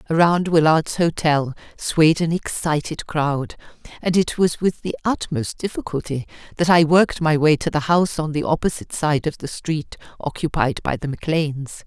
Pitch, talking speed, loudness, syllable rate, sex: 155 Hz, 165 wpm, -20 LUFS, 5.0 syllables/s, female